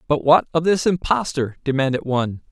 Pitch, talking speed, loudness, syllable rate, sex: 145 Hz, 165 wpm, -19 LUFS, 5.7 syllables/s, male